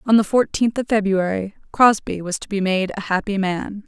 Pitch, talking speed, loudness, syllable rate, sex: 205 Hz, 200 wpm, -20 LUFS, 5.1 syllables/s, female